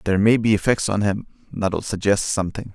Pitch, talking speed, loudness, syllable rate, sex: 100 Hz, 195 wpm, -21 LUFS, 5.9 syllables/s, male